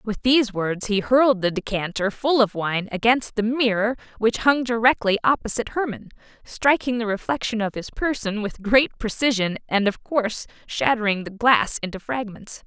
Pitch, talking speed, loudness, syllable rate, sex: 225 Hz, 165 wpm, -22 LUFS, 5.0 syllables/s, female